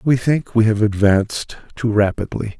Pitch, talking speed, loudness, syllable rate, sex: 110 Hz, 160 wpm, -18 LUFS, 4.6 syllables/s, male